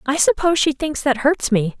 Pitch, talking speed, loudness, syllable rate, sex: 285 Hz, 235 wpm, -18 LUFS, 5.4 syllables/s, female